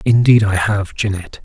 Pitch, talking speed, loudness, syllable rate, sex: 105 Hz, 165 wpm, -15 LUFS, 5.3 syllables/s, male